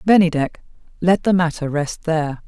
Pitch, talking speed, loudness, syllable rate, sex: 165 Hz, 145 wpm, -19 LUFS, 5.1 syllables/s, female